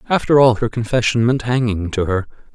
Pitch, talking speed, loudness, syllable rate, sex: 115 Hz, 190 wpm, -17 LUFS, 5.7 syllables/s, male